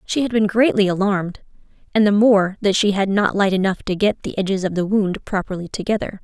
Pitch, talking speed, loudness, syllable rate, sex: 200 Hz, 210 wpm, -19 LUFS, 5.8 syllables/s, female